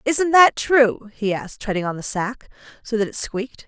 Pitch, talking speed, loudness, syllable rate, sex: 230 Hz, 210 wpm, -20 LUFS, 5.0 syllables/s, female